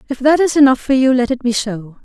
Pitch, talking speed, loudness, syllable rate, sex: 255 Hz, 295 wpm, -14 LUFS, 6.1 syllables/s, female